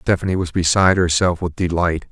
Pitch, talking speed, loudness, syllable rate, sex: 85 Hz, 170 wpm, -18 LUFS, 5.8 syllables/s, male